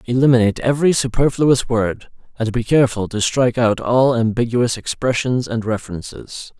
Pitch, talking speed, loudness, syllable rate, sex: 120 Hz, 135 wpm, -17 LUFS, 5.3 syllables/s, male